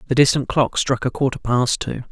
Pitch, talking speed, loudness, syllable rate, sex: 130 Hz, 225 wpm, -19 LUFS, 5.4 syllables/s, male